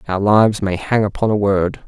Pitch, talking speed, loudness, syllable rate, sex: 100 Hz, 225 wpm, -16 LUFS, 5.3 syllables/s, male